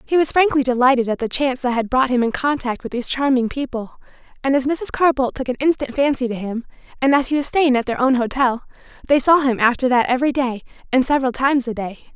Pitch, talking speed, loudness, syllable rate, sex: 260 Hz, 240 wpm, -18 LUFS, 6.5 syllables/s, female